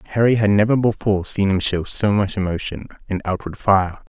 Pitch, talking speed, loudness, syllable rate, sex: 100 Hz, 190 wpm, -19 LUFS, 5.7 syllables/s, male